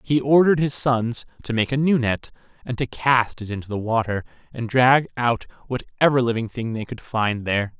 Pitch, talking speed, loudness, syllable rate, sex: 120 Hz, 200 wpm, -21 LUFS, 5.1 syllables/s, male